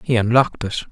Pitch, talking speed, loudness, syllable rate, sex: 115 Hz, 195 wpm, -18 LUFS, 6.4 syllables/s, male